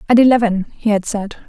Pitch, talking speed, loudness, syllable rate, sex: 215 Hz, 205 wpm, -16 LUFS, 6.3 syllables/s, female